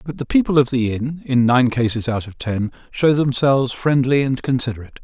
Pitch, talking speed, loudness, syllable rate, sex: 130 Hz, 205 wpm, -18 LUFS, 5.6 syllables/s, male